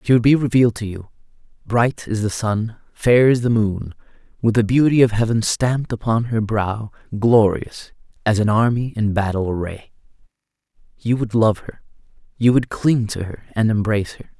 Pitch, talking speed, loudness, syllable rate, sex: 110 Hz, 175 wpm, -19 LUFS, 5.0 syllables/s, male